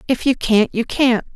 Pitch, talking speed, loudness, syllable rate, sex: 240 Hz, 220 wpm, -17 LUFS, 4.4 syllables/s, female